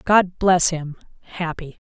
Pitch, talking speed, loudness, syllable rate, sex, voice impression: 170 Hz, 95 wpm, -20 LUFS, 3.9 syllables/s, female, feminine, adult-like, tensed, powerful, slightly bright, clear, slightly halting, friendly, slightly reassuring, elegant, lively, kind